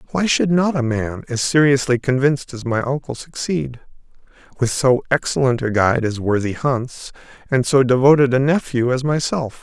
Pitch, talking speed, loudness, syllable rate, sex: 130 Hz, 170 wpm, -18 LUFS, 5.0 syllables/s, male